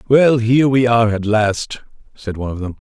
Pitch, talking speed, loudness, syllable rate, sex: 115 Hz, 210 wpm, -16 LUFS, 5.7 syllables/s, male